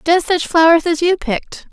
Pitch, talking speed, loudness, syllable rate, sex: 330 Hz, 210 wpm, -14 LUFS, 5.1 syllables/s, female